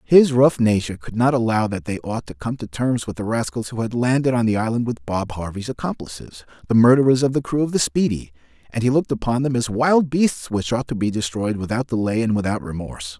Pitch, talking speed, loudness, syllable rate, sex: 115 Hz, 235 wpm, -20 LUFS, 5.9 syllables/s, male